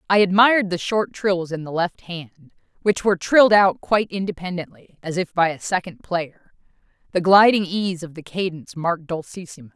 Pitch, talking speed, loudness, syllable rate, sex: 180 Hz, 180 wpm, -20 LUFS, 5.4 syllables/s, female